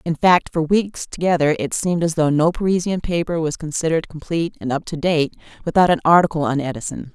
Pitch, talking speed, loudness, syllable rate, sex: 160 Hz, 200 wpm, -19 LUFS, 6.0 syllables/s, female